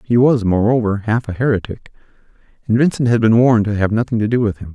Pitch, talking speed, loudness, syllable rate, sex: 115 Hz, 230 wpm, -16 LUFS, 6.4 syllables/s, male